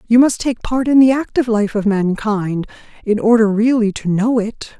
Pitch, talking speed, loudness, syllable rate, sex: 220 Hz, 200 wpm, -16 LUFS, 5.1 syllables/s, female